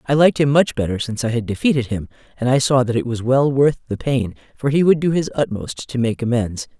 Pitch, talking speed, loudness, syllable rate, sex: 125 Hz, 255 wpm, -19 LUFS, 6.0 syllables/s, female